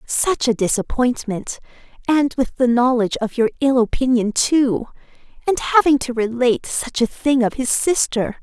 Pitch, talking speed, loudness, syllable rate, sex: 250 Hz, 155 wpm, -18 LUFS, 4.7 syllables/s, female